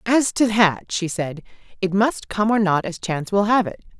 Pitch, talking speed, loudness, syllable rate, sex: 200 Hz, 225 wpm, -20 LUFS, 5.0 syllables/s, female